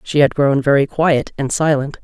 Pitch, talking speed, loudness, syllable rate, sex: 145 Hz, 205 wpm, -16 LUFS, 4.9 syllables/s, female